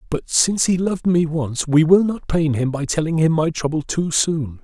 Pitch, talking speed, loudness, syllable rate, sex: 160 Hz, 235 wpm, -19 LUFS, 5.0 syllables/s, male